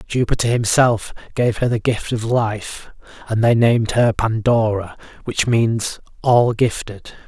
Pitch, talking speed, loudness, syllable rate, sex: 115 Hz, 140 wpm, -18 LUFS, 4.1 syllables/s, male